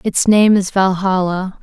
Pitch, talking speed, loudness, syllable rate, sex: 190 Hz, 150 wpm, -14 LUFS, 4.0 syllables/s, female